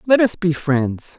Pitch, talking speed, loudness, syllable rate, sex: 175 Hz, 200 wpm, -18 LUFS, 3.7 syllables/s, male